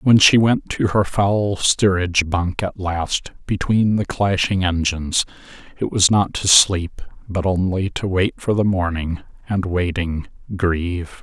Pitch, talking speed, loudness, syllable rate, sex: 95 Hz, 155 wpm, -19 LUFS, 4.0 syllables/s, male